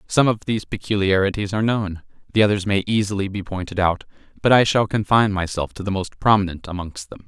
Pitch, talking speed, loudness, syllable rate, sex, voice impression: 100 Hz, 200 wpm, -20 LUFS, 6.2 syllables/s, male, very masculine, very adult-like, very thick, very tensed, powerful, slightly dark, hard, clear, fluent, slightly raspy, cool, very intellectual, refreshing, very sincere, calm, mature, very friendly, reassuring, unique, elegant, slightly wild, sweet, slightly lively, kind, slightly modest